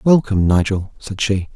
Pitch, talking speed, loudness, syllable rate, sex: 105 Hz, 155 wpm, -17 LUFS, 4.9 syllables/s, male